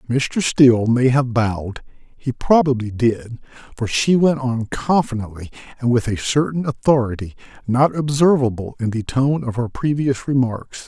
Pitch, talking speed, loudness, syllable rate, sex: 125 Hz, 150 wpm, -18 LUFS, 4.5 syllables/s, male